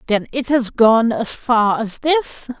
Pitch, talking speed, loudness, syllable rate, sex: 235 Hz, 185 wpm, -17 LUFS, 3.5 syllables/s, female